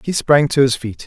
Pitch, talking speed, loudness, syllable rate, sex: 135 Hz, 280 wpm, -15 LUFS, 5.2 syllables/s, male